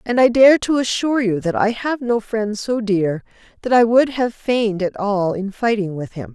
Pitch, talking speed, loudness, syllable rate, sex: 220 Hz, 225 wpm, -18 LUFS, 4.8 syllables/s, female